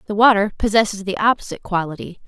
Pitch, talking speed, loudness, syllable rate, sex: 205 Hz, 160 wpm, -18 LUFS, 7.0 syllables/s, female